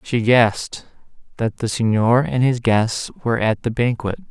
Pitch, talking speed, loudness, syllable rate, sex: 115 Hz, 165 wpm, -19 LUFS, 4.5 syllables/s, male